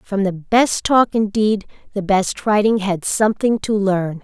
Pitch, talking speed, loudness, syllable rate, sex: 205 Hz, 170 wpm, -18 LUFS, 4.1 syllables/s, female